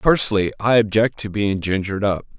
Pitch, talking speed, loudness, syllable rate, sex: 105 Hz, 175 wpm, -19 LUFS, 6.0 syllables/s, male